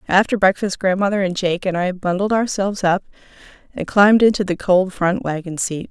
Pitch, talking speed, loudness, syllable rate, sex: 190 Hz, 185 wpm, -18 LUFS, 5.5 syllables/s, female